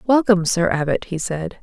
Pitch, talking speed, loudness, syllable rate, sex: 185 Hz, 185 wpm, -19 LUFS, 5.2 syllables/s, female